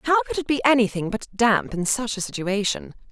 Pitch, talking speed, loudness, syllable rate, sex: 230 Hz, 210 wpm, -22 LUFS, 5.2 syllables/s, female